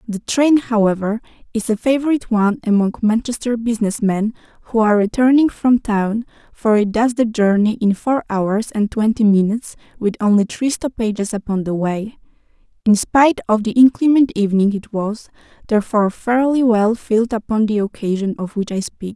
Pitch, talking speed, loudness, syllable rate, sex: 220 Hz, 165 wpm, -17 LUFS, 5.4 syllables/s, female